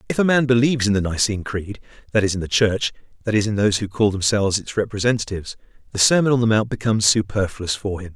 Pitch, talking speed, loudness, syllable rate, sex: 105 Hz, 230 wpm, -20 LUFS, 6.9 syllables/s, male